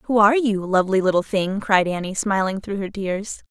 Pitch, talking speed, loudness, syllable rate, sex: 200 Hz, 205 wpm, -21 LUFS, 5.3 syllables/s, female